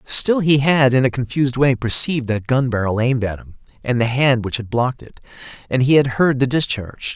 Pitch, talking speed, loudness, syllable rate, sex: 125 Hz, 225 wpm, -17 LUFS, 5.7 syllables/s, male